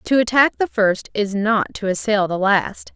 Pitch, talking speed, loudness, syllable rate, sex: 210 Hz, 205 wpm, -18 LUFS, 4.4 syllables/s, female